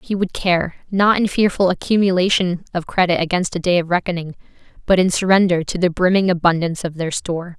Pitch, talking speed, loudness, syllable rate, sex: 180 Hz, 190 wpm, -18 LUFS, 5.9 syllables/s, female